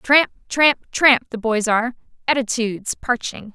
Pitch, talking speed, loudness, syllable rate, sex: 240 Hz, 135 wpm, -19 LUFS, 4.2 syllables/s, female